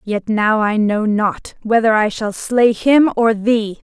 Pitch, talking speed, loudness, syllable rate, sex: 220 Hz, 185 wpm, -15 LUFS, 3.7 syllables/s, female